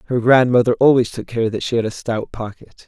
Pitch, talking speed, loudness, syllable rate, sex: 115 Hz, 230 wpm, -17 LUFS, 5.7 syllables/s, male